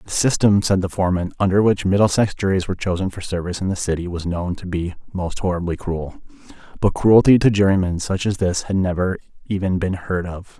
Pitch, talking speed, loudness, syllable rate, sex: 95 Hz, 200 wpm, -20 LUFS, 5.9 syllables/s, male